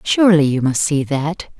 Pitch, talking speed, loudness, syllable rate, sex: 155 Hz, 190 wpm, -16 LUFS, 4.9 syllables/s, female